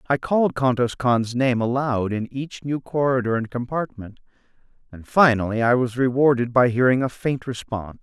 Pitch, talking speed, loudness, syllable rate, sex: 125 Hz, 165 wpm, -21 LUFS, 5.0 syllables/s, male